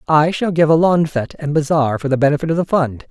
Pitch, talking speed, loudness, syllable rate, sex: 150 Hz, 270 wpm, -16 LUFS, 6.1 syllables/s, male